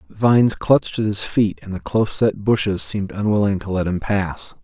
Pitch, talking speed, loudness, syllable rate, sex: 100 Hz, 205 wpm, -20 LUFS, 5.2 syllables/s, male